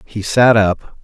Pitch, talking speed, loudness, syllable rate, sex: 110 Hz, 175 wpm, -14 LUFS, 3.3 syllables/s, male